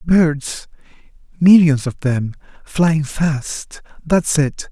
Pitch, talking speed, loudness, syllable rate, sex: 150 Hz, 65 wpm, -16 LUFS, 2.6 syllables/s, male